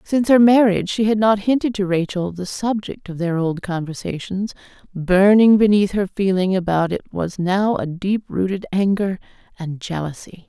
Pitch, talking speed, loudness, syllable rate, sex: 190 Hz, 165 wpm, -19 LUFS, 4.9 syllables/s, female